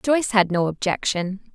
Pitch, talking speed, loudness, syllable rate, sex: 205 Hz, 155 wpm, -22 LUFS, 4.6 syllables/s, female